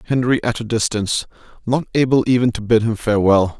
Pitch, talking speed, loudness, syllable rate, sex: 115 Hz, 165 wpm, -18 LUFS, 6.1 syllables/s, male